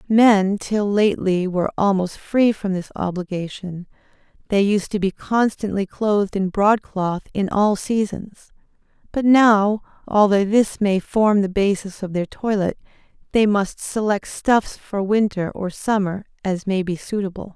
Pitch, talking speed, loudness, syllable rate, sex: 200 Hz, 145 wpm, -20 LUFS, 4.2 syllables/s, female